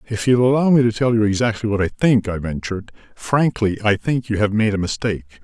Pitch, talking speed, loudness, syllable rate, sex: 110 Hz, 230 wpm, -18 LUFS, 6.1 syllables/s, male